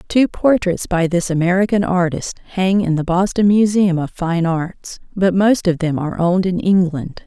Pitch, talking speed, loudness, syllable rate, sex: 180 Hz, 180 wpm, -17 LUFS, 4.7 syllables/s, female